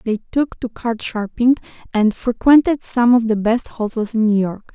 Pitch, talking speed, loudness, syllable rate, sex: 230 Hz, 190 wpm, -17 LUFS, 4.7 syllables/s, female